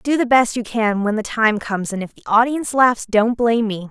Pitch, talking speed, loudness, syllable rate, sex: 225 Hz, 260 wpm, -18 LUFS, 5.5 syllables/s, female